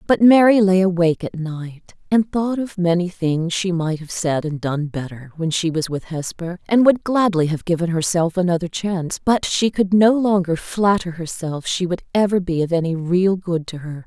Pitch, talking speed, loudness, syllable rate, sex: 180 Hz, 205 wpm, -19 LUFS, 4.8 syllables/s, female